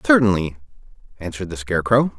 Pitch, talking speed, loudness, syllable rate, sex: 100 Hz, 110 wpm, -20 LUFS, 7.0 syllables/s, male